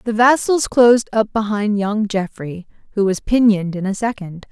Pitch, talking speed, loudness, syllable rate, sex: 215 Hz, 175 wpm, -17 LUFS, 4.9 syllables/s, female